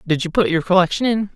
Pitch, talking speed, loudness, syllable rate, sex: 190 Hz, 265 wpm, -18 LUFS, 6.7 syllables/s, female